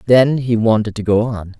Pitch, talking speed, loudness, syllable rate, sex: 115 Hz, 225 wpm, -16 LUFS, 5.0 syllables/s, male